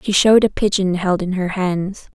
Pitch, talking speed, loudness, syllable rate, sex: 190 Hz, 225 wpm, -17 LUFS, 4.8 syllables/s, female